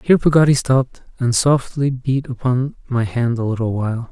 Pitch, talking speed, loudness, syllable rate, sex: 125 Hz, 175 wpm, -18 LUFS, 5.4 syllables/s, male